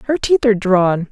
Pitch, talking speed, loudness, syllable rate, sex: 215 Hz, 215 wpm, -15 LUFS, 5.3 syllables/s, female